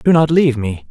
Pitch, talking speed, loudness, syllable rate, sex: 140 Hz, 265 wpm, -14 LUFS, 6.0 syllables/s, male